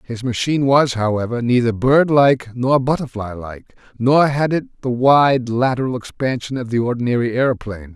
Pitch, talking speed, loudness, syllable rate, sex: 125 Hz, 160 wpm, -17 LUFS, 5.1 syllables/s, male